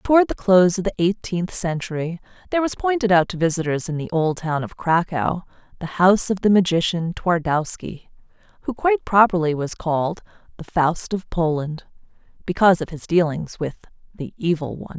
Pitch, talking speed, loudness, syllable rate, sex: 180 Hz, 170 wpm, -21 LUFS, 5.5 syllables/s, female